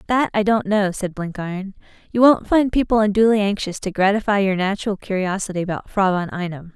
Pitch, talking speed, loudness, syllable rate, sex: 200 Hz, 185 wpm, -19 LUFS, 5.8 syllables/s, female